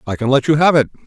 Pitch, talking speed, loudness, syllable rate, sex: 135 Hz, 335 wpm, -14 LUFS, 7.6 syllables/s, male